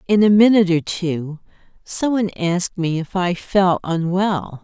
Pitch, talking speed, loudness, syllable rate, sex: 185 Hz, 170 wpm, -18 LUFS, 4.5 syllables/s, female